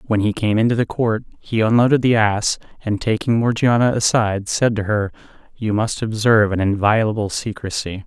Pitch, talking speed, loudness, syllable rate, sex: 110 Hz, 170 wpm, -18 LUFS, 5.3 syllables/s, male